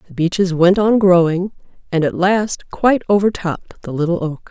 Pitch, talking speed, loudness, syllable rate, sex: 185 Hz, 175 wpm, -16 LUFS, 5.3 syllables/s, female